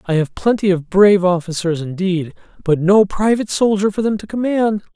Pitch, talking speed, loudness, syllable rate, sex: 190 Hz, 180 wpm, -16 LUFS, 5.4 syllables/s, male